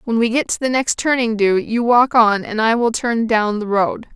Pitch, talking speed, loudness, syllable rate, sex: 230 Hz, 260 wpm, -17 LUFS, 4.8 syllables/s, female